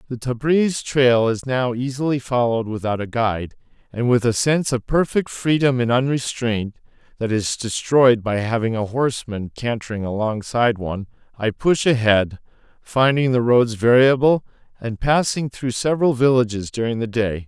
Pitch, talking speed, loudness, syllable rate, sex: 120 Hz, 150 wpm, -20 LUFS, 4.9 syllables/s, male